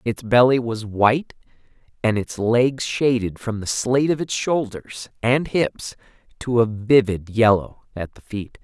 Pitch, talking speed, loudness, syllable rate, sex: 115 Hz, 160 wpm, -20 LUFS, 4.1 syllables/s, male